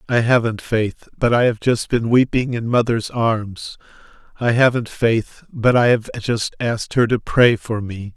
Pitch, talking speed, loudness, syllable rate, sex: 115 Hz, 185 wpm, -18 LUFS, 4.3 syllables/s, male